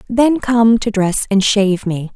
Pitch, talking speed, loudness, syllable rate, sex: 215 Hz, 195 wpm, -14 LUFS, 4.3 syllables/s, female